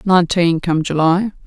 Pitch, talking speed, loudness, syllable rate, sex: 175 Hz, 125 wpm, -16 LUFS, 4.8 syllables/s, female